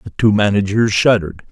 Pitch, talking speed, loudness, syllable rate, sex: 100 Hz, 160 wpm, -15 LUFS, 6.0 syllables/s, male